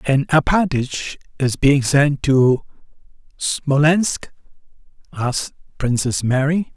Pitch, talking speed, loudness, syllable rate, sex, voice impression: 140 Hz, 90 wpm, -18 LUFS, 3.4 syllables/s, male, very masculine, very adult-like, old, very thick, slightly tensed, slightly weak, slightly dark, hard, muffled, slightly halting, raspy, cool, intellectual, very sincere, very calm, very mature, very friendly, reassuring, unique, very wild, slightly lively, kind, slightly intense